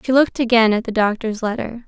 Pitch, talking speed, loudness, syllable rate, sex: 230 Hz, 225 wpm, -18 LUFS, 6.3 syllables/s, female